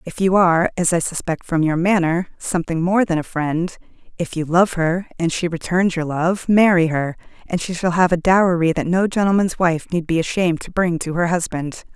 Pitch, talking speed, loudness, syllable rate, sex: 175 Hz, 205 wpm, -19 LUFS, 5.2 syllables/s, female